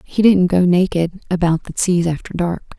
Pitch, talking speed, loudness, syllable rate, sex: 180 Hz, 195 wpm, -17 LUFS, 5.2 syllables/s, female